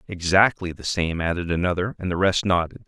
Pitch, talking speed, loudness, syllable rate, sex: 90 Hz, 190 wpm, -22 LUFS, 5.8 syllables/s, male